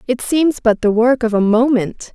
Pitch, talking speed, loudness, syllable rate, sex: 235 Hz, 225 wpm, -15 LUFS, 4.5 syllables/s, female